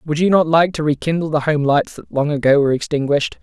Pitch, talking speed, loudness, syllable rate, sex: 150 Hz, 245 wpm, -17 LUFS, 6.2 syllables/s, male